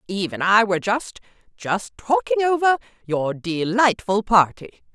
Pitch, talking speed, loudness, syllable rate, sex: 210 Hz, 120 wpm, -20 LUFS, 4.6 syllables/s, female